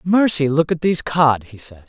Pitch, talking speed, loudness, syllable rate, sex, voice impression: 150 Hz, 225 wpm, -17 LUFS, 5.1 syllables/s, male, masculine, adult-like, tensed, powerful, bright, clear, slightly halting, friendly, unique, wild, lively, intense